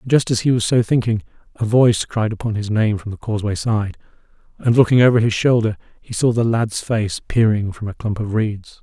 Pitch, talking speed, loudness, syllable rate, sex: 110 Hz, 225 wpm, -18 LUFS, 5.5 syllables/s, male